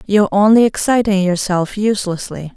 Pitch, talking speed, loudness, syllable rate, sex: 200 Hz, 140 wpm, -15 LUFS, 5.8 syllables/s, female